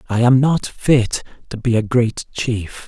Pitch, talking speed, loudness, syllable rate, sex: 120 Hz, 190 wpm, -18 LUFS, 3.8 syllables/s, male